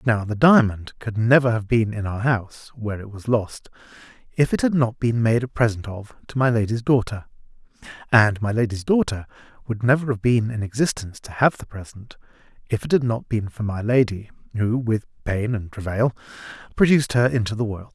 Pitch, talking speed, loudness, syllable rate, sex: 115 Hz, 195 wpm, -21 LUFS, 5.4 syllables/s, male